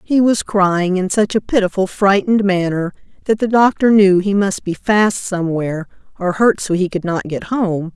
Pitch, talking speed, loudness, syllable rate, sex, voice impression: 195 Hz, 195 wpm, -16 LUFS, 4.9 syllables/s, female, very feminine, very middle-aged, thin, very tensed, powerful, bright, hard, very clear, fluent, cool, intellectual, very refreshing, sincere, very calm, friendly, reassuring, very unique, elegant, very wild, lively, strict, slightly intense, sharp